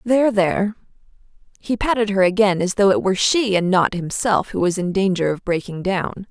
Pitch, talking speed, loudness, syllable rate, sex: 195 Hz, 200 wpm, -19 LUFS, 5.4 syllables/s, female